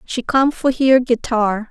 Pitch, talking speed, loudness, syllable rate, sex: 245 Hz, 175 wpm, -16 LUFS, 3.7 syllables/s, female